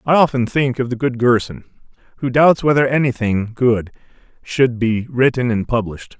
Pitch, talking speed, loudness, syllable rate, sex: 120 Hz, 165 wpm, -17 LUFS, 5.0 syllables/s, male